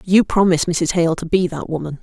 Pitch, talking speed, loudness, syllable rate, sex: 170 Hz, 235 wpm, -18 LUFS, 5.7 syllables/s, female